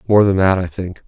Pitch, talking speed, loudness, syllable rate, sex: 95 Hz, 280 wpm, -16 LUFS, 5.7 syllables/s, male